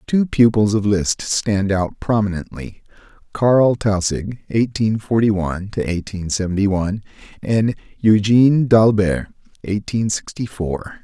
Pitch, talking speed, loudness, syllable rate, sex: 105 Hz, 115 wpm, -18 LUFS, 2.7 syllables/s, male